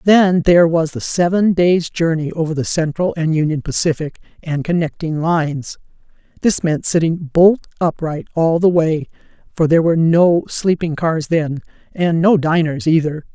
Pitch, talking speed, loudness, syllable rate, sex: 165 Hz, 155 wpm, -16 LUFS, 4.8 syllables/s, female